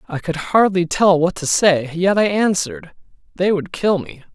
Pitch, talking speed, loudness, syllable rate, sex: 175 Hz, 195 wpm, -17 LUFS, 4.6 syllables/s, male